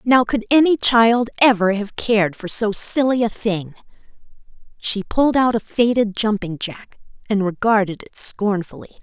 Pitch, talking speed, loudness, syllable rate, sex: 215 Hz, 155 wpm, -18 LUFS, 4.6 syllables/s, female